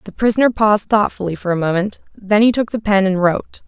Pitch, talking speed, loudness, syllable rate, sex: 205 Hz, 230 wpm, -16 LUFS, 6.1 syllables/s, female